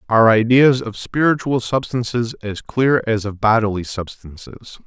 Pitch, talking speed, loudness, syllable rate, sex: 115 Hz, 135 wpm, -17 LUFS, 4.4 syllables/s, male